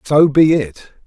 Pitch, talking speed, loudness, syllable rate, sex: 140 Hz, 170 wpm, -13 LUFS, 3.5 syllables/s, male